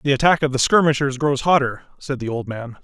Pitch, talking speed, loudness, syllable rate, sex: 135 Hz, 235 wpm, -19 LUFS, 6.0 syllables/s, male